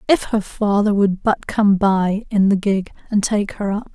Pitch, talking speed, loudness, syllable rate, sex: 205 Hz, 215 wpm, -18 LUFS, 4.2 syllables/s, female